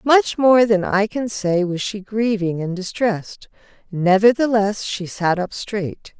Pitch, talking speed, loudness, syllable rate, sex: 205 Hz, 155 wpm, -19 LUFS, 3.9 syllables/s, female